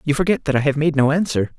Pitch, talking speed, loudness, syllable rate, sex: 145 Hz, 300 wpm, -18 LUFS, 6.8 syllables/s, male